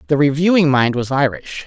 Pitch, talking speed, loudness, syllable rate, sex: 145 Hz, 180 wpm, -15 LUFS, 5.4 syllables/s, female